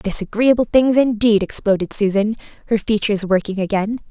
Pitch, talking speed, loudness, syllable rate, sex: 215 Hz, 130 wpm, -17 LUFS, 5.6 syllables/s, female